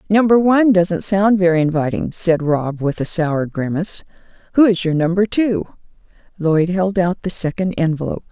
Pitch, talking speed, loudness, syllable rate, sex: 180 Hz, 165 wpm, -17 LUFS, 5.0 syllables/s, female